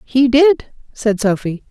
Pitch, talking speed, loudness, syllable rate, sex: 245 Hz, 140 wpm, -15 LUFS, 3.7 syllables/s, female